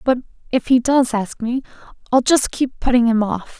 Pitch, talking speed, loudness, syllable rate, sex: 245 Hz, 200 wpm, -18 LUFS, 4.9 syllables/s, female